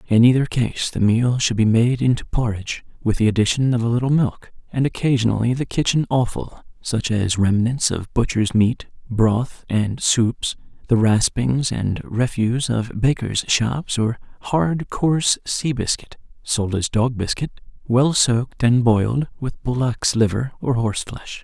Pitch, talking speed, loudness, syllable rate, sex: 120 Hz, 155 wpm, -20 LUFS, 4.3 syllables/s, male